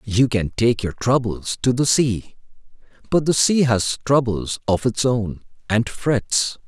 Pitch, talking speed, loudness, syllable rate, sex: 120 Hz, 160 wpm, -20 LUFS, 3.8 syllables/s, male